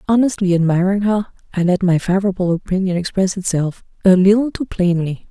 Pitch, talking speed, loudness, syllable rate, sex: 190 Hz, 160 wpm, -17 LUFS, 5.8 syllables/s, female